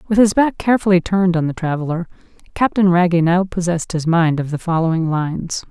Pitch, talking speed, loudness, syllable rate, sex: 175 Hz, 190 wpm, -17 LUFS, 6.2 syllables/s, female